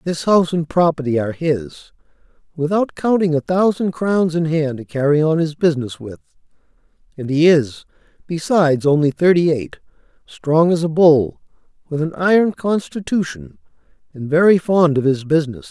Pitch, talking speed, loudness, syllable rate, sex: 160 Hz, 155 wpm, -17 LUFS, 5.1 syllables/s, male